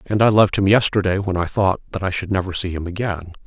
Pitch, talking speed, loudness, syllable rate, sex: 95 Hz, 260 wpm, -19 LUFS, 6.4 syllables/s, male